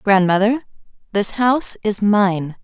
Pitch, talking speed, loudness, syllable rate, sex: 205 Hz, 115 wpm, -17 LUFS, 4.1 syllables/s, female